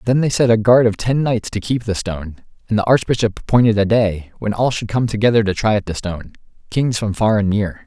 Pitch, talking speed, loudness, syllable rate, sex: 110 Hz, 245 wpm, -17 LUFS, 5.9 syllables/s, male